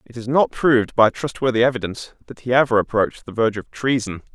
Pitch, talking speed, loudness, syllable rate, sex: 120 Hz, 205 wpm, -19 LUFS, 6.5 syllables/s, male